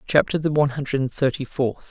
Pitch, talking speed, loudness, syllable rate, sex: 140 Hz, 220 wpm, -22 LUFS, 6.3 syllables/s, male